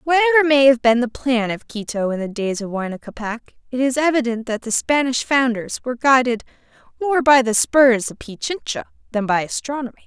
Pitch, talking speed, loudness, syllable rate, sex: 250 Hz, 190 wpm, -19 LUFS, 5.6 syllables/s, female